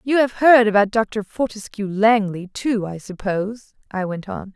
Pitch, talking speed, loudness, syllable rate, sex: 210 Hz, 170 wpm, -19 LUFS, 4.5 syllables/s, female